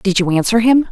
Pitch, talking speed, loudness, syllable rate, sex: 210 Hz, 260 wpm, -14 LUFS, 5.8 syllables/s, female